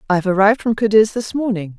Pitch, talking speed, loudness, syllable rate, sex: 205 Hz, 235 wpm, -16 LUFS, 6.8 syllables/s, female